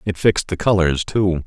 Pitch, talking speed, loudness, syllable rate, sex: 90 Hz, 205 wpm, -18 LUFS, 5.2 syllables/s, male